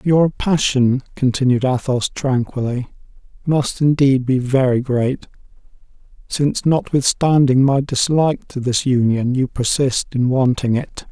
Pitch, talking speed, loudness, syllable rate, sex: 130 Hz, 120 wpm, -17 LUFS, 4.2 syllables/s, male